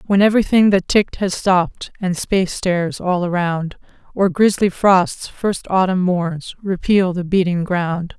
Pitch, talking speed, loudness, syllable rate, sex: 185 Hz, 155 wpm, -17 LUFS, 4.4 syllables/s, female